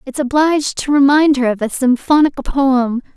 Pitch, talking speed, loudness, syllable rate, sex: 270 Hz, 170 wpm, -14 LUFS, 5.0 syllables/s, female